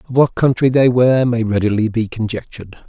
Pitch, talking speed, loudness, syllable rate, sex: 115 Hz, 190 wpm, -15 LUFS, 6.2 syllables/s, male